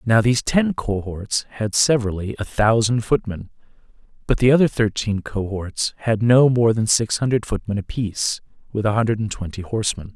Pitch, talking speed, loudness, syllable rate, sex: 110 Hz, 165 wpm, -20 LUFS, 5.2 syllables/s, male